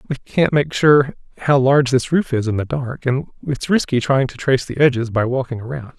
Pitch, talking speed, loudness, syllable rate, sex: 135 Hz, 230 wpm, -18 LUFS, 5.6 syllables/s, male